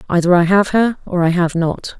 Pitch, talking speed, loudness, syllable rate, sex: 180 Hz, 240 wpm, -15 LUFS, 5.1 syllables/s, female